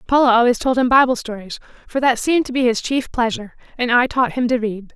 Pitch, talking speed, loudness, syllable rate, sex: 245 Hz, 240 wpm, -17 LUFS, 6.2 syllables/s, female